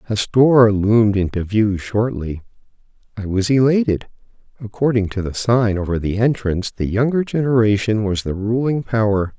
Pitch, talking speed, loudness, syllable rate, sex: 110 Hz, 145 wpm, -18 LUFS, 5.1 syllables/s, male